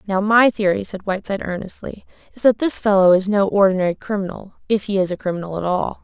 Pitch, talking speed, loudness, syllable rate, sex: 195 Hz, 210 wpm, -18 LUFS, 6.4 syllables/s, female